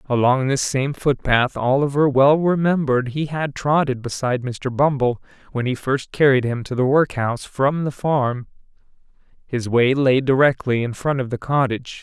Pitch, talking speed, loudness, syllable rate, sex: 135 Hz, 165 wpm, -19 LUFS, 4.8 syllables/s, male